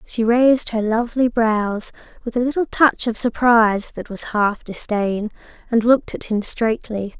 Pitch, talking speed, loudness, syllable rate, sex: 230 Hz, 165 wpm, -19 LUFS, 4.6 syllables/s, female